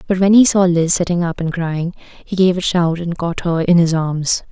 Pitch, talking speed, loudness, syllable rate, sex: 175 Hz, 255 wpm, -16 LUFS, 4.9 syllables/s, female